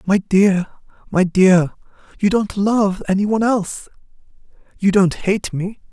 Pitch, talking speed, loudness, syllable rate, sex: 195 Hz, 130 wpm, -17 LUFS, 4.1 syllables/s, male